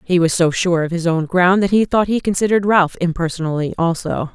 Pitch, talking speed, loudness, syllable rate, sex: 180 Hz, 220 wpm, -17 LUFS, 5.8 syllables/s, female